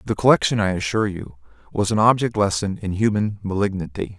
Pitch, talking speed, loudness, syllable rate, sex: 100 Hz, 170 wpm, -21 LUFS, 5.8 syllables/s, male